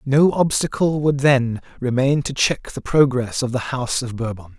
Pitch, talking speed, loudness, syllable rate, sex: 130 Hz, 185 wpm, -19 LUFS, 4.8 syllables/s, male